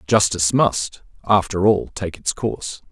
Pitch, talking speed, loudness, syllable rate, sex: 95 Hz, 145 wpm, -20 LUFS, 4.5 syllables/s, male